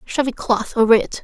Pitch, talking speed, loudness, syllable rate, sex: 230 Hz, 240 wpm, -18 LUFS, 6.4 syllables/s, female